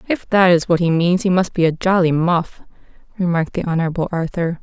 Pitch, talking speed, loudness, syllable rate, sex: 170 Hz, 205 wpm, -17 LUFS, 5.9 syllables/s, female